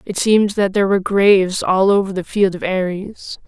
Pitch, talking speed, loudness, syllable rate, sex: 195 Hz, 205 wpm, -16 LUFS, 5.2 syllables/s, female